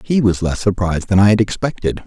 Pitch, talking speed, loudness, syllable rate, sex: 105 Hz, 235 wpm, -16 LUFS, 6.1 syllables/s, male